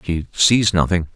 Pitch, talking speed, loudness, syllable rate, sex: 90 Hz, 155 wpm, -17 LUFS, 4.4 syllables/s, male